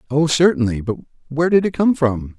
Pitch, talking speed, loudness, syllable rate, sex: 145 Hz, 200 wpm, -17 LUFS, 6.0 syllables/s, male